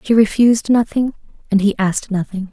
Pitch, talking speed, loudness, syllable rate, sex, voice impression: 210 Hz, 165 wpm, -16 LUFS, 6.0 syllables/s, female, feminine, slightly adult-like, slightly soft, slightly cute, slightly refreshing, friendly, slightly sweet, kind